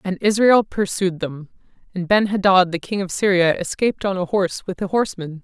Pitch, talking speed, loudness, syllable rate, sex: 190 Hz, 200 wpm, -19 LUFS, 5.5 syllables/s, female